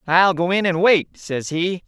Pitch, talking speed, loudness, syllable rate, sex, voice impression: 175 Hz, 225 wpm, -19 LUFS, 4.2 syllables/s, male, masculine, adult-like, tensed, powerful, bright, slightly soft, muffled, friendly, slightly reassuring, unique, slightly wild, lively, intense, light